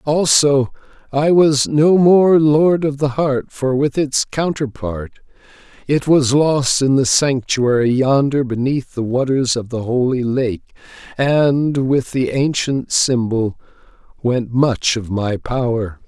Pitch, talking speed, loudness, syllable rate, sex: 135 Hz, 140 wpm, -16 LUFS, 3.6 syllables/s, male